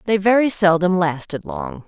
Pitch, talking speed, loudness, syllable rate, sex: 165 Hz, 160 wpm, -18 LUFS, 4.7 syllables/s, female